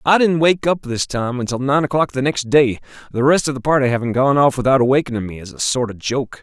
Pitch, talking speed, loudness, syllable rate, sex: 135 Hz, 260 wpm, -17 LUFS, 6.1 syllables/s, male